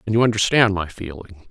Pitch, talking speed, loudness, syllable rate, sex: 100 Hz, 200 wpm, -18 LUFS, 5.8 syllables/s, male